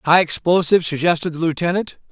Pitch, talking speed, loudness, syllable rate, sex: 170 Hz, 140 wpm, -18 LUFS, 6.4 syllables/s, male